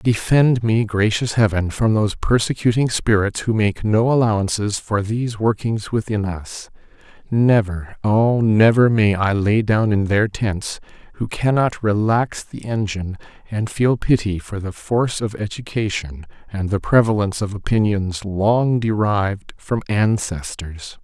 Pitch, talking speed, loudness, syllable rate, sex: 105 Hz, 135 wpm, -19 LUFS, 4.5 syllables/s, male